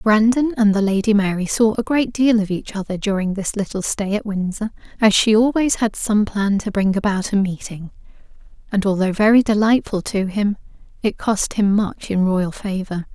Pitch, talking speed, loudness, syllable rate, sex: 205 Hz, 190 wpm, -19 LUFS, 5.0 syllables/s, female